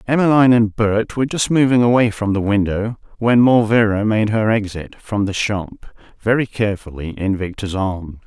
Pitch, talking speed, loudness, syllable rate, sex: 110 Hz, 165 wpm, -17 LUFS, 5.0 syllables/s, male